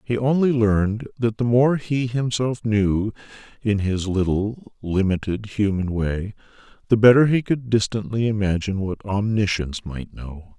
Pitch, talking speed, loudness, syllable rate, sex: 105 Hz, 140 wpm, -21 LUFS, 4.8 syllables/s, male